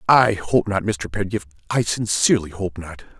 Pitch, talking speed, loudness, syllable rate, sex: 95 Hz, 170 wpm, -21 LUFS, 4.8 syllables/s, male